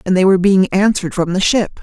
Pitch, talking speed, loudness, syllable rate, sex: 190 Hz, 265 wpm, -14 LUFS, 6.4 syllables/s, female